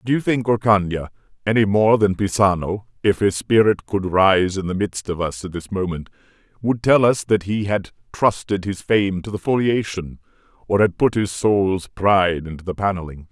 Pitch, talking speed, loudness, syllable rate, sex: 100 Hz, 190 wpm, -19 LUFS, 4.9 syllables/s, male